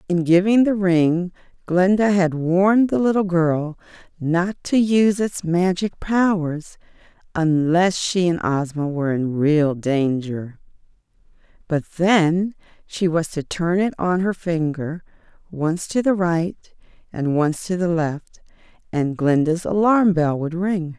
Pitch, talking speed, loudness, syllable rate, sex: 175 Hz, 140 wpm, -20 LUFS, 3.8 syllables/s, female